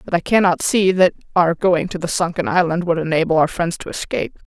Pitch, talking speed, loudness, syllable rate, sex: 170 Hz, 225 wpm, -18 LUFS, 5.8 syllables/s, female